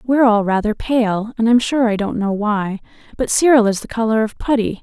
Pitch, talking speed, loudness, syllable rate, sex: 225 Hz, 225 wpm, -17 LUFS, 5.3 syllables/s, female